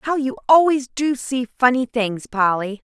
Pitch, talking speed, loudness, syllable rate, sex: 250 Hz, 165 wpm, -19 LUFS, 4.3 syllables/s, female